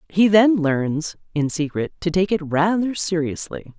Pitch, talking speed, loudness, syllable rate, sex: 170 Hz, 160 wpm, -20 LUFS, 4.2 syllables/s, female